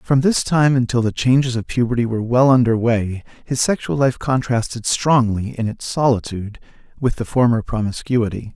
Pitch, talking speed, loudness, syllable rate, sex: 120 Hz, 170 wpm, -18 LUFS, 5.2 syllables/s, male